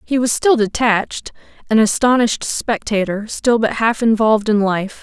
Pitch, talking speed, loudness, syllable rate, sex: 220 Hz, 155 wpm, -16 LUFS, 4.9 syllables/s, female